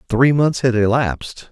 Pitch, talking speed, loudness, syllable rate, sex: 125 Hz, 160 wpm, -16 LUFS, 4.5 syllables/s, male